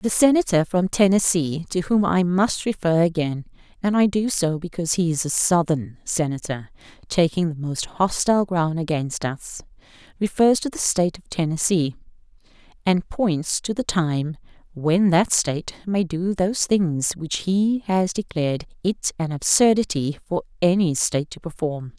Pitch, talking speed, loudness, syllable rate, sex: 175 Hz, 150 wpm, -21 LUFS, 4.6 syllables/s, female